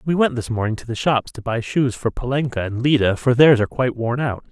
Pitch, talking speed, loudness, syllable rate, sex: 125 Hz, 265 wpm, -19 LUFS, 6.0 syllables/s, male